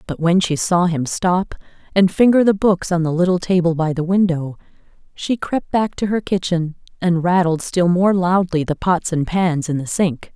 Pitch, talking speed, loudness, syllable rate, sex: 175 Hz, 195 wpm, -18 LUFS, 4.7 syllables/s, female